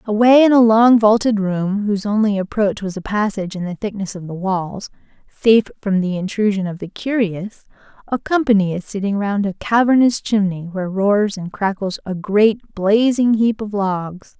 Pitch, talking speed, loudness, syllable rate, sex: 205 Hz, 180 wpm, -17 LUFS, 4.9 syllables/s, female